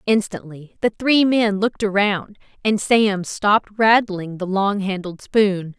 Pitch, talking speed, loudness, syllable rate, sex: 205 Hz, 145 wpm, -19 LUFS, 4.1 syllables/s, female